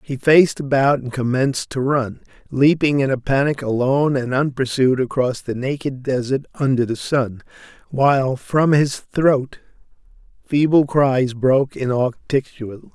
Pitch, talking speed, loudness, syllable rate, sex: 135 Hz, 135 wpm, -18 LUFS, 4.7 syllables/s, male